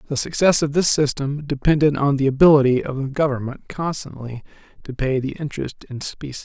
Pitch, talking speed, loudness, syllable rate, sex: 140 Hz, 175 wpm, -20 LUFS, 5.8 syllables/s, male